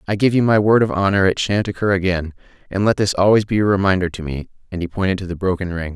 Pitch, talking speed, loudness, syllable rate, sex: 95 Hz, 270 wpm, -18 LUFS, 6.7 syllables/s, male